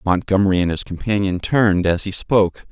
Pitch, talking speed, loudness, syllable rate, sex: 95 Hz, 175 wpm, -18 LUFS, 5.8 syllables/s, male